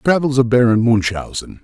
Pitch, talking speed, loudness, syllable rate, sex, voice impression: 120 Hz, 145 wpm, -15 LUFS, 5.2 syllables/s, male, masculine, middle-aged, relaxed, slightly weak, muffled, raspy, intellectual, calm, mature, slightly reassuring, wild, modest